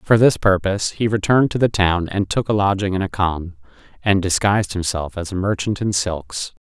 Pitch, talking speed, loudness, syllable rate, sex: 95 Hz, 210 wpm, -19 LUFS, 5.3 syllables/s, male